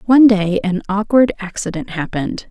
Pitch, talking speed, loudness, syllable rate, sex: 205 Hz, 145 wpm, -16 LUFS, 5.2 syllables/s, female